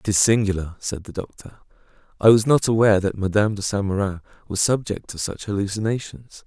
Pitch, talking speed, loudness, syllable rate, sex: 100 Hz, 185 wpm, -21 LUFS, 6.0 syllables/s, male